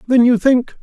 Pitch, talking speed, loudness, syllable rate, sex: 245 Hz, 220 wpm, -13 LUFS, 4.8 syllables/s, male